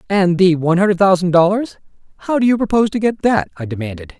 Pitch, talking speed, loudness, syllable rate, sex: 185 Hz, 200 wpm, -15 LUFS, 6.8 syllables/s, male